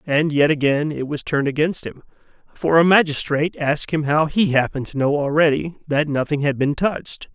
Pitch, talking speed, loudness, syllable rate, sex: 150 Hz, 195 wpm, -19 LUFS, 5.6 syllables/s, male